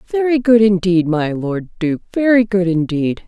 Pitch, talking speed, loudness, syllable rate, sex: 195 Hz, 165 wpm, -16 LUFS, 4.4 syllables/s, female